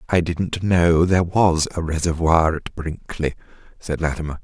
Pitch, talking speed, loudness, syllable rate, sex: 85 Hz, 150 wpm, -20 LUFS, 4.6 syllables/s, male